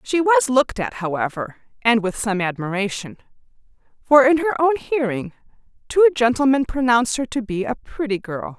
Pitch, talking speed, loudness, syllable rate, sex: 235 Hz, 160 wpm, -19 LUFS, 5.2 syllables/s, female